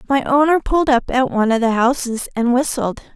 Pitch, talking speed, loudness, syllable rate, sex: 255 Hz, 210 wpm, -17 LUFS, 5.6 syllables/s, female